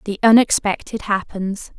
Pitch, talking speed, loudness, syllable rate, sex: 205 Hz, 100 wpm, -18 LUFS, 4.4 syllables/s, female